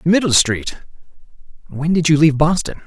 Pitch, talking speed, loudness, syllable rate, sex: 155 Hz, 170 wpm, -15 LUFS, 6.1 syllables/s, male